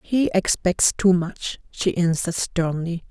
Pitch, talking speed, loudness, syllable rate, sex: 180 Hz, 135 wpm, -22 LUFS, 4.0 syllables/s, female